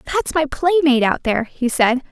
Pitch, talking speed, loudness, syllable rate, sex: 280 Hz, 225 wpm, -17 LUFS, 6.1 syllables/s, female